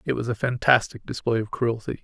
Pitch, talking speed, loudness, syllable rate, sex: 120 Hz, 205 wpm, -24 LUFS, 5.8 syllables/s, male